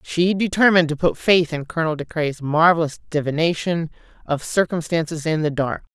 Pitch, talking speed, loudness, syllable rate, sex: 160 Hz, 160 wpm, -20 LUFS, 5.5 syllables/s, female